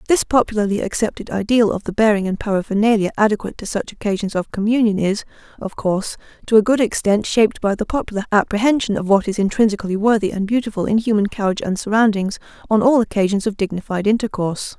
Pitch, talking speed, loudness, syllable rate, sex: 210 Hz, 185 wpm, -18 LUFS, 6.6 syllables/s, female